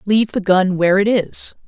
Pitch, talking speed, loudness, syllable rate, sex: 200 Hz, 215 wpm, -16 LUFS, 5.5 syllables/s, female